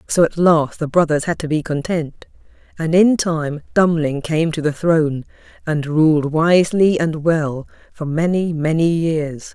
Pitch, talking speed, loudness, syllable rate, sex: 160 Hz, 165 wpm, -17 LUFS, 4.2 syllables/s, female